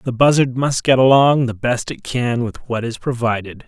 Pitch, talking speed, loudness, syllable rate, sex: 125 Hz, 210 wpm, -17 LUFS, 4.7 syllables/s, male